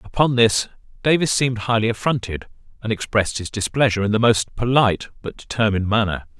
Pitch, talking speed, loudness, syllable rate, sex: 110 Hz, 160 wpm, -20 LUFS, 6.3 syllables/s, male